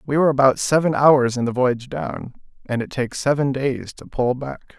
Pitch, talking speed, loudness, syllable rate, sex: 135 Hz, 215 wpm, -20 LUFS, 5.5 syllables/s, male